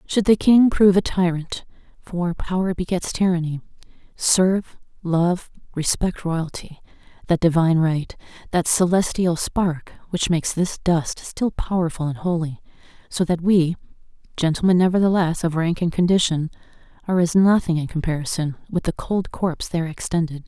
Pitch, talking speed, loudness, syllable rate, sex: 175 Hz, 135 wpm, -21 LUFS, 5.0 syllables/s, female